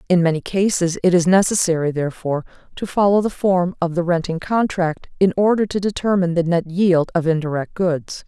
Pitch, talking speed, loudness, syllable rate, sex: 175 Hz, 180 wpm, -19 LUFS, 5.6 syllables/s, female